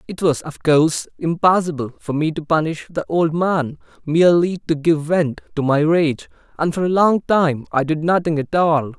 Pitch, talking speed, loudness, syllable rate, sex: 160 Hz, 195 wpm, -18 LUFS, 4.8 syllables/s, male